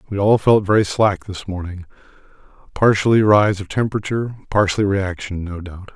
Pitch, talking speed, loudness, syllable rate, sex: 100 Hz, 150 wpm, -18 LUFS, 5.0 syllables/s, male